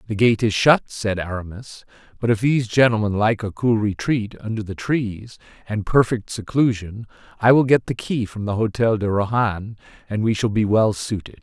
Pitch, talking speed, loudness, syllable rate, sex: 110 Hz, 190 wpm, -20 LUFS, 4.9 syllables/s, male